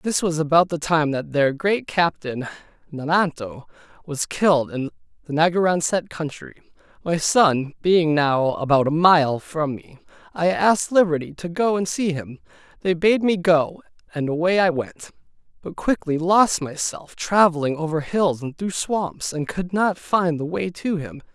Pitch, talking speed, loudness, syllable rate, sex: 165 Hz, 165 wpm, -21 LUFS, 4.4 syllables/s, male